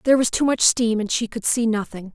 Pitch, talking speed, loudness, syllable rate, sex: 225 Hz, 280 wpm, -20 LUFS, 5.9 syllables/s, female